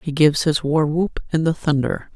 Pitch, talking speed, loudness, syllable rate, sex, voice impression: 155 Hz, 220 wpm, -19 LUFS, 5.2 syllables/s, female, very feminine, middle-aged, thin, tensed, slightly weak, slightly dark, soft, clear, fluent, slightly raspy, slightly cute, intellectual, refreshing, sincere, calm, very friendly, very reassuring, unique, elegant, slightly wild, sweet, slightly lively, kind, modest